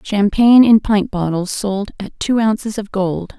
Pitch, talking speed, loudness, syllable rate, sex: 205 Hz, 175 wpm, -15 LUFS, 4.4 syllables/s, female